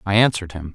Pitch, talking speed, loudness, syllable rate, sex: 95 Hz, 240 wpm, -19 LUFS, 7.9 syllables/s, male